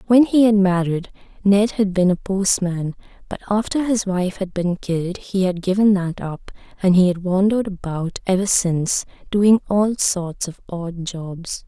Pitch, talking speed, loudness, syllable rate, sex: 190 Hz, 175 wpm, -19 LUFS, 4.4 syllables/s, female